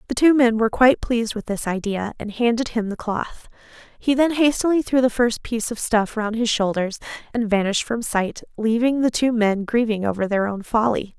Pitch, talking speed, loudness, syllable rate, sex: 225 Hz, 210 wpm, -21 LUFS, 5.4 syllables/s, female